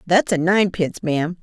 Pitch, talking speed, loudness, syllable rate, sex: 175 Hz, 170 wpm, -19 LUFS, 6.2 syllables/s, female